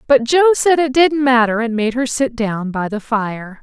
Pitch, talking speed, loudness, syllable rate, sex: 245 Hz, 230 wpm, -16 LUFS, 4.4 syllables/s, female